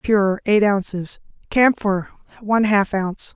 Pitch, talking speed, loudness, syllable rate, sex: 205 Hz, 125 wpm, -19 LUFS, 4.1 syllables/s, female